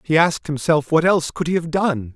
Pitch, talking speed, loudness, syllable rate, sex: 155 Hz, 250 wpm, -19 LUFS, 5.9 syllables/s, male